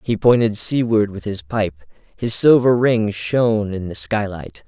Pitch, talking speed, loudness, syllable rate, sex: 105 Hz, 180 wpm, -18 LUFS, 4.4 syllables/s, male